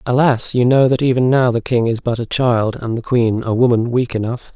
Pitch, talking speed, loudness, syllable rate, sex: 120 Hz, 250 wpm, -16 LUFS, 5.2 syllables/s, male